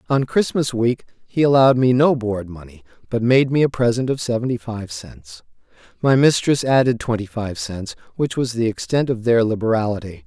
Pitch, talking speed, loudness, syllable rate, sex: 120 Hz, 180 wpm, -19 LUFS, 5.2 syllables/s, male